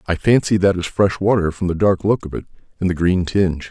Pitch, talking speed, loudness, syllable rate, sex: 95 Hz, 260 wpm, -18 LUFS, 5.9 syllables/s, male